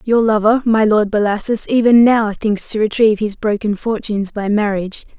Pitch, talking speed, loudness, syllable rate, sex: 215 Hz, 175 wpm, -15 LUFS, 5.3 syllables/s, female